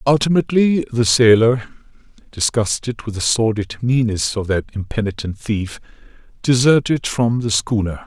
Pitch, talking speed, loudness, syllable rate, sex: 115 Hz, 120 wpm, -17 LUFS, 4.7 syllables/s, male